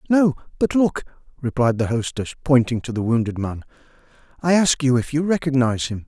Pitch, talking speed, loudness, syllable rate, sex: 135 Hz, 180 wpm, -20 LUFS, 5.6 syllables/s, male